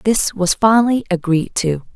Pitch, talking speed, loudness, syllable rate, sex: 195 Hz, 155 wpm, -16 LUFS, 4.5 syllables/s, female